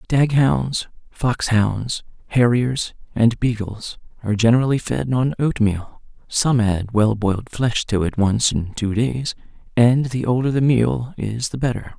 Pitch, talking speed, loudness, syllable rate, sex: 115 Hz, 145 wpm, -20 LUFS, 4.2 syllables/s, male